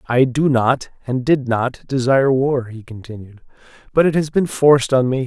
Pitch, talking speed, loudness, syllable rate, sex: 130 Hz, 195 wpm, -17 LUFS, 4.8 syllables/s, male